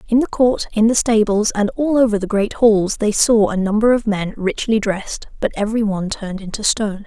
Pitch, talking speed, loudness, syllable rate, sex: 215 Hz, 220 wpm, -17 LUFS, 5.6 syllables/s, female